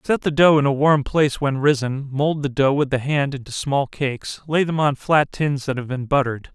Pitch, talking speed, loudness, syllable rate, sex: 140 Hz, 245 wpm, -20 LUFS, 5.2 syllables/s, male